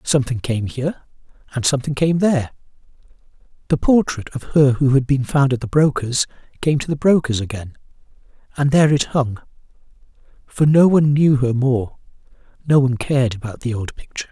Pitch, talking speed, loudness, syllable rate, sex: 135 Hz, 165 wpm, -18 LUFS, 5.9 syllables/s, male